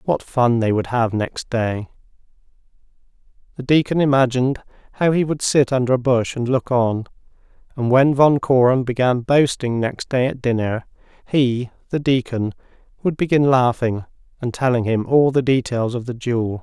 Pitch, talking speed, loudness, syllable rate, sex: 125 Hz, 160 wpm, -19 LUFS, 4.8 syllables/s, male